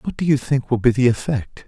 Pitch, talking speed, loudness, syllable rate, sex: 125 Hz, 285 wpm, -19 LUFS, 5.5 syllables/s, male